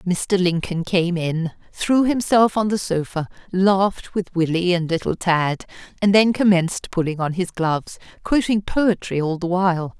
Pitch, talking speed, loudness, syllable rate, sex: 185 Hz, 160 wpm, -20 LUFS, 4.5 syllables/s, female